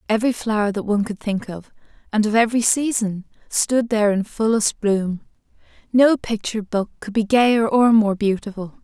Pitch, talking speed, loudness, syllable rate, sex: 215 Hz, 170 wpm, -19 LUFS, 5.2 syllables/s, female